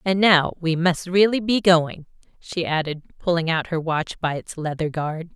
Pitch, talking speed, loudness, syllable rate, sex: 170 Hz, 190 wpm, -21 LUFS, 4.5 syllables/s, female